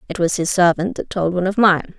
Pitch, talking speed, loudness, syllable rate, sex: 180 Hz, 270 wpm, -17 LUFS, 6.1 syllables/s, female